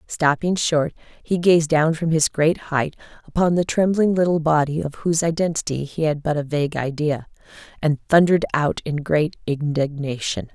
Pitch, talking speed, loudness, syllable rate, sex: 155 Hz, 165 wpm, -21 LUFS, 4.9 syllables/s, female